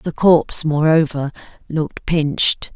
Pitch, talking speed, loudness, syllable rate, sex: 155 Hz, 110 wpm, -17 LUFS, 4.3 syllables/s, female